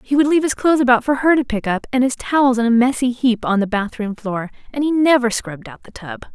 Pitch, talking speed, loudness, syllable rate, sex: 245 Hz, 275 wpm, -17 LUFS, 6.3 syllables/s, female